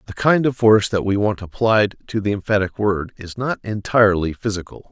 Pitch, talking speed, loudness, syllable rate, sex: 105 Hz, 195 wpm, -19 LUFS, 5.5 syllables/s, male